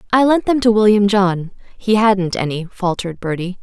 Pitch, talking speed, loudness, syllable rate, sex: 200 Hz, 165 wpm, -16 LUFS, 5.4 syllables/s, female